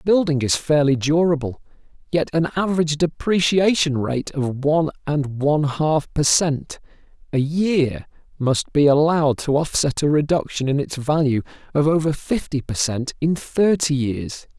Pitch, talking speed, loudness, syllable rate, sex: 150 Hz, 150 wpm, -20 LUFS, 4.7 syllables/s, male